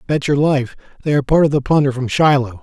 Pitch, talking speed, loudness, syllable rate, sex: 140 Hz, 275 wpm, -16 LUFS, 6.8 syllables/s, male